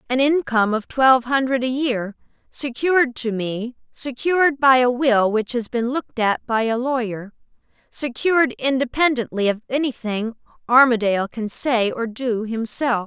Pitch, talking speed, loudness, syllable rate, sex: 245 Hz, 145 wpm, -20 LUFS, 4.7 syllables/s, female